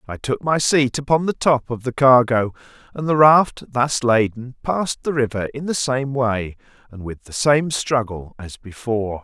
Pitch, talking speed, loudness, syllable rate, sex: 125 Hz, 190 wpm, -19 LUFS, 4.5 syllables/s, male